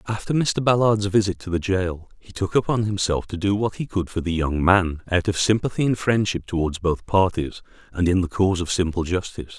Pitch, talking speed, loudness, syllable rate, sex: 95 Hz, 220 wpm, -22 LUFS, 5.4 syllables/s, male